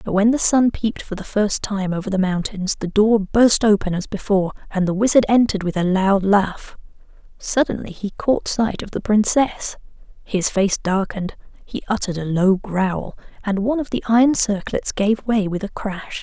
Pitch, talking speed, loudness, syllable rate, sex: 205 Hz, 190 wpm, -19 LUFS, 5.0 syllables/s, female